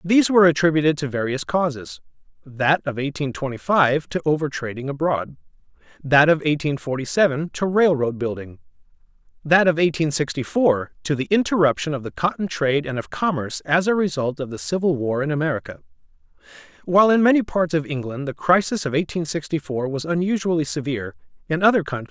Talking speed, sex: 190 wpm, male